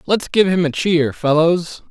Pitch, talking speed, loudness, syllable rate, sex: 170 Hz, 190 wpm, -16 LUFS, 4.0 syllables/s, male